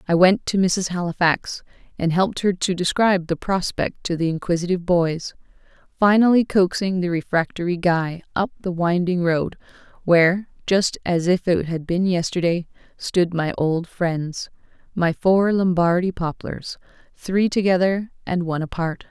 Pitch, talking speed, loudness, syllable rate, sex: 175 Hz, 145 wpm, -21 LUFS, 4.7 syllables/s, female